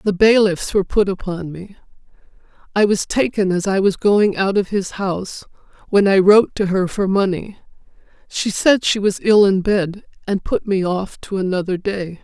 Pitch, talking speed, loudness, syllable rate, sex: 195 Hz, 185 wpm, -17 LUFS, 4.8 syllables/s, female